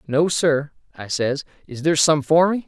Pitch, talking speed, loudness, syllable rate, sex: 155 Hz, 200 wpm, -19 LUFS, 4.8 syllables/s, male